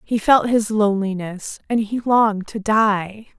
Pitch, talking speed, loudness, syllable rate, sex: 210 Hz, 160 wpm, -19 LUFS, 4.2 syllables/s, female